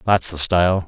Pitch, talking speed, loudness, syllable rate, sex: 90 Hz, 205 wpm, -17 LUFS, 5.5 syllables/s, male